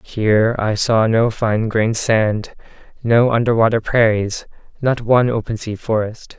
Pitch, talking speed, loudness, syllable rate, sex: 110 Hz, 140 wpm, -17 LUFS, 4.4 syllables/s, male